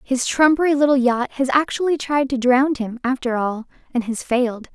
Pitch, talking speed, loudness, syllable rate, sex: 260 Hz, 190 wpm, -19 LUFS, 5.1 syllables/s, female